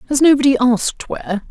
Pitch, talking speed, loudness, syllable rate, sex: 260 Hz, 160 wpm, -15 LUFS, 6.5 syllables/s, female